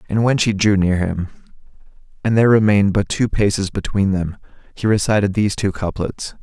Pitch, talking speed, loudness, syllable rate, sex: 100 Hz, 175 wpm, -18 LUFS, 5.7 syllables/s, male